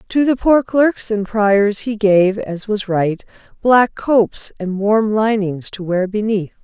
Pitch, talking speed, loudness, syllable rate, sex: 210 Hz, 170 wpm, -16 LUFS, 3.7 syllables/s, female